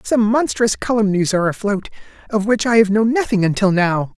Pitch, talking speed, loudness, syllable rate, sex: 205 Hz, 170 wpm, -17 LUFS, 5.4 syllables/s, male